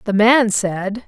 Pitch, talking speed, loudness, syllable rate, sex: 215 Hz, 165 wpm, -16 LUFS, 3.2 syllables/s, female